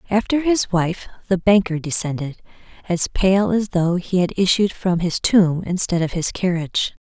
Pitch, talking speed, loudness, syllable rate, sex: 185 Hz, 170 wpm, -19 LUFS, 4.6 syllables/s, female